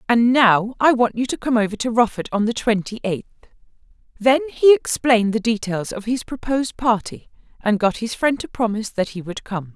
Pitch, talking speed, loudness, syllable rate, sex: 225 Hz, 205 wpm, -20 LUFS, 5.4 syllables/s, female